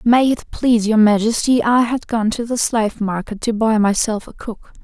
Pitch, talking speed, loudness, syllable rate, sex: 225 Hz, 210 wpm, -17 LUFS, 5.0 syllables/s, female